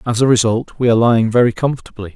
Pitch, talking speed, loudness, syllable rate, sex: 115 Hz, 225 wpm, -14 LUFS, 7.4 syllables/s, male